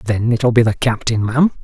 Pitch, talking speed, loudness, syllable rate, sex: 120 Hz, 220 wpm, -16 LUFS, 5.3 syllables/s, male